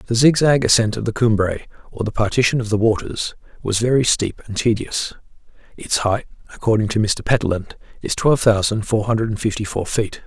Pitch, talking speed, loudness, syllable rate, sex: 110 Hz, 180 wpm, -19 LUFS, 5.5 syllables/s, male